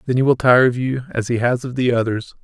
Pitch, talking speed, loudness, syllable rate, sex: 125 Hz, 295 wpm, -18 LUFS, 6.0 syllables/s, male